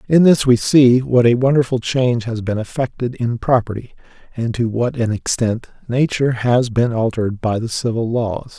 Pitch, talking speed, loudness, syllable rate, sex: 120 Hz, 180 wpm, -17 LUFS, 5.0 syllables/s, male